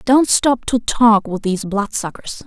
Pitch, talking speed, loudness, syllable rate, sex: 220 Hz, 170 wpm, -16 LUFS, 4.2 syllables/s, female